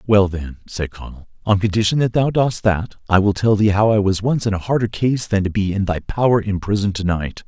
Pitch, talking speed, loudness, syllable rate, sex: 100 Hz, 255 wpm, -18 LUFS, 5.5 syllables/s, male